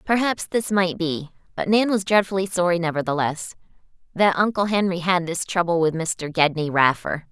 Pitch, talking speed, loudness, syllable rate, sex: 180 Hz, 165 wpm, -21 LUFS, 5.0 syllables/s, female